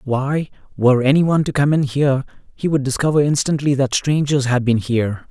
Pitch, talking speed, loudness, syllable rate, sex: 135 Hz, 190 wpm, -17 LUFS, 5.8 syllables/s, male